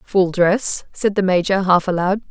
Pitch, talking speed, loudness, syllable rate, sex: 190 Hz, 180 wpm, -17 LUFS, 4.3 syllables/s, female